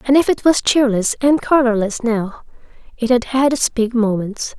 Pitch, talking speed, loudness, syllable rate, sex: 245 Hz, 185 wpm, -16 LUFS, 4.7 syllables/s, female